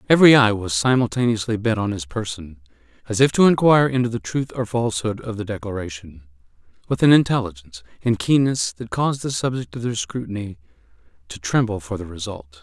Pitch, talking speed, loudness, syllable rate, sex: 110 Hz, 175 wpm, -20 LUFS, 6.0 syllables/s, male